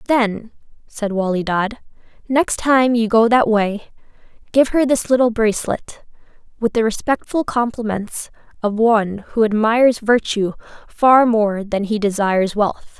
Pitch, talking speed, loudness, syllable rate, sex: 225 Hz, 140 wpm, -17 LUFS, 4.3 syllables/s, female